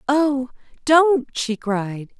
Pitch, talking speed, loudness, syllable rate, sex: 260 Hz, 110 wpm, -20 LUFS, 2.5 syllables/s, female